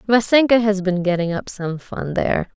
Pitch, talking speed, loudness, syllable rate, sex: 200 Hz, 185 wpm, -19 LUFS, 5.0 syllables/s, female